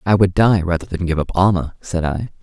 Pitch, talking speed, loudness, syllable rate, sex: 90 Hz, 250 wpm, -18 LUFS, 5.6 syllables/s, male